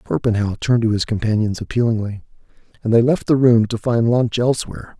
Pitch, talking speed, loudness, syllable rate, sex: 115 Hz, 180 wpm, -18 LUFS, 6.2 syllables/s, male